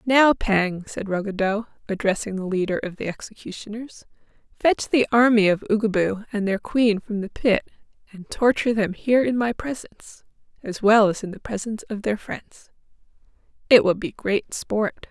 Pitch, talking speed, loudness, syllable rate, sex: 215 Hz, 165 wpm, -22 LUFS, 4.9 syllables/s, female